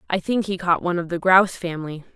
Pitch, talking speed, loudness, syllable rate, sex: 180 Hz, 250 wpm, -21 LUFS, 7.0 syllables/s, female